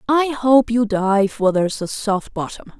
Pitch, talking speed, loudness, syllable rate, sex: 220 Hz, 215 wpm, -18 LUFS, 5.0 syllables/s, female